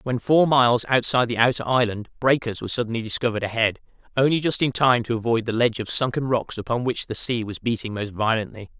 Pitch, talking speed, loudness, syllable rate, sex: 120 Hz, 210 wpm, -22 LUFS, 6.4 syllables/s, male